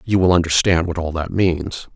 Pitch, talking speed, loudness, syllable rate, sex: 85 Hz, 215 wpm, -18 LUFS, 4.9 syllables/s, male